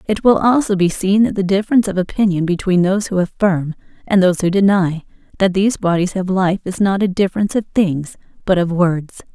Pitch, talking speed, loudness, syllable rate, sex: 190 Hz, 205 wpm, -16 LUFS, 5.9 syllables/s, female